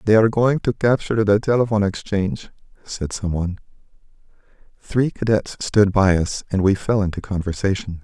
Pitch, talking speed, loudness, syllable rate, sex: 100 Hz, 155 wpm, -20 LUFS, 5.6 syllables/s, male